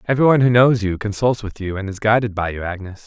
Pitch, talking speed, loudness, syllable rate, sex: 105 Hz, 255 wpm, -18 LUFS, 6.5 syllables/s, male